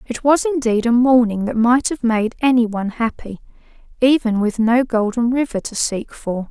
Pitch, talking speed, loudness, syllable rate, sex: 235 Hz, 175 wpm, -17 LUFS, 4.8 syllables/s, female